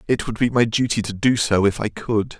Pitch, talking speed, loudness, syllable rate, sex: 110 Hz, 275 wpm, -20 LUFS, 5.4 syllables/s, male